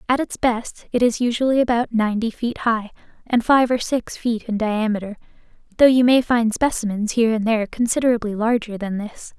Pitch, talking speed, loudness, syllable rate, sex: 230 Hz, 185 wpm, -20 LUFS, 5.5 syllables/s, female